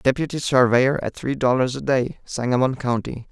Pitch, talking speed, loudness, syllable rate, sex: 130 Hz, 165 wpm, -21 LUFS, 5.0 syllables/s, male